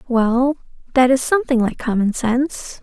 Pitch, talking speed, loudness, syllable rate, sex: 250 Hz, 150 wpm, -18 LUFS, 4.8 syllables/s, female